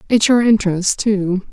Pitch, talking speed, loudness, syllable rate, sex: 205 Hz, 160 wpm, -15 LUFS, 4.6 syllables/s, female